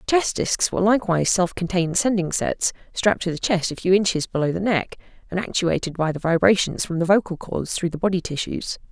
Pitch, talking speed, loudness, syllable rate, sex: 180 Hz, 210 wpm, -22 LUFS, 6.1 syllables/s, female